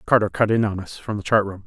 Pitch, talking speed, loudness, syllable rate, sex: 100 Hz, 325 wpm, -21 LUFS, 6.5 syllables/s, male